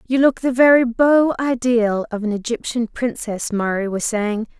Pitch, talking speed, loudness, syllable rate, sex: 235 Hz, 170 wpm, -18 LUFS, 4.4 syllables/s, female